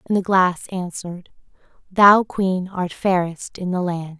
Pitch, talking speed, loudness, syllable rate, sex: 185 Hz, 155 wpm, -19 LUFS, 4.0 syllables/s, female